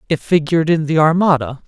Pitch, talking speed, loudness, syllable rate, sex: 160 Hz, 180 wpm, -15 LUFS, 6.1 syllables/s, male